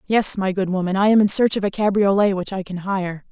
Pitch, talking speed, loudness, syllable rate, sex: 195 Hz, 270 wpm, -19 LUFS, 5.7 syllables/s, female